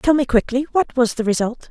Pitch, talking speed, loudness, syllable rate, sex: 255 Hz, 210 wpm, -19 LUFS, 5.6 syllables/s, female